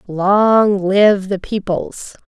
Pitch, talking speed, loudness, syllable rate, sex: 195 Hz, 105 wpm, -15 LUFS, 2.5 syllables/s, female